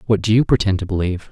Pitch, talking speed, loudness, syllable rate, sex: 100 Hz, 275 wpm, -18 LUFS, 7.7 syllables/s, male